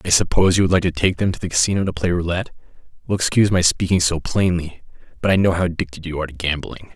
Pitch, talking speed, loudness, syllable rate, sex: 85 Hz, 250 wpm, -19 LUFS, 7.2 syllables/s, male